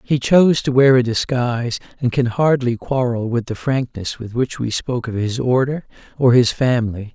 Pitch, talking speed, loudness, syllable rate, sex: 125 Hz, 195 wpm, -18 LUFS, 5.0 syllables/s, male